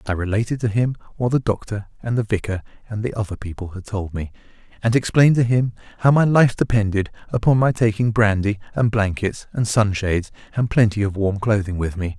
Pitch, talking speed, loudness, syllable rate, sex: 110 Hz, 200 wpm, -20 LUFS, 5.9 syllables/s, male